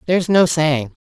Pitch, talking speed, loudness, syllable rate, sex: 160 Hz, 175 wpm, -16 LUFS, 5.1 syllables/s, female